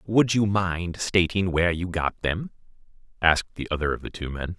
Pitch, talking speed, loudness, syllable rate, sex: 90 Hz, 195 wpm, -25 LUFS, 5.0 syllables/s, male